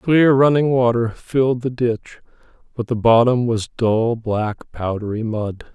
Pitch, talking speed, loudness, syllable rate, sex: 120 Hz, 145 wpm, -18 LUFS, 4.2 syllables/s, male